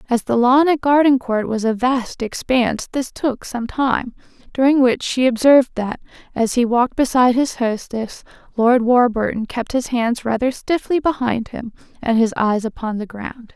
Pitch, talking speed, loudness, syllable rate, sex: 245 Hz, 175 wpm, -18 LUFS, 4.7 syllables/s, female